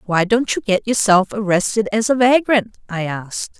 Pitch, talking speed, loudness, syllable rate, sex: 210 Hz, 185 wpm, -17 LUFS, 5.0 syllables/s, female